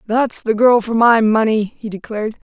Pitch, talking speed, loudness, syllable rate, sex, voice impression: 220 Hz, 190 wpm, -15 LUFS, 5.0 syllables/s, female, feminine, young, relaxed, bright, soft, muffled, cute, calm, friendly, reassuring, slightly elegant, kind, slightly modest